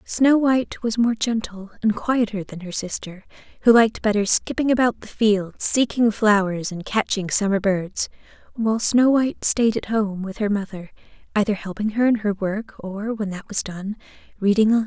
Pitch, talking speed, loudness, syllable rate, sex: 215 Hz, 180 wpm, -21 LUFS, 5.0 syllables/s, female